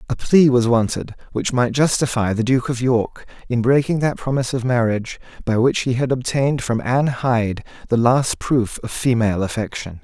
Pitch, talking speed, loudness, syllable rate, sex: 125 Hz, 185 wpm, -19 LUFS, 5.3 syllables/s, male